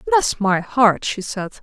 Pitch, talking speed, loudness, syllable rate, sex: 215 Hz, 185 wpm, -18 LUFS, 3.6 syllables/s, female